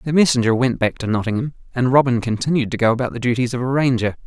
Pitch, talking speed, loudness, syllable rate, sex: 125 Hz, 240 wpm, -19 LUFS, 6.9 syllables/s, male